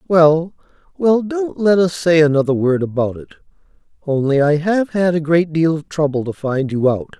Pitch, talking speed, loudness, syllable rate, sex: 160 Hz, 190 wpm, -16 LUFS, 4.8 syllables/s, male